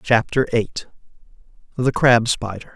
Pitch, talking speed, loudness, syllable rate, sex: 120 Hz, 110 wpm, -19 LUFS, 4.1 syllables/s, male